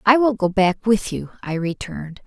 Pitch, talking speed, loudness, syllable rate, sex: 200 Hz, 210 wpm, -20 LUFS, 4.9 syllables/s, female